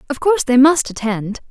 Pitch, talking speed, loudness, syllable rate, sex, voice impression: 265 Hz, 200 wpm, -15 LUFS, 5.7 syllables/s, female, feminine, adult-like, tensed, bright, fluent, slightly intellectual, friendly, slightly reassuring, elegant, kind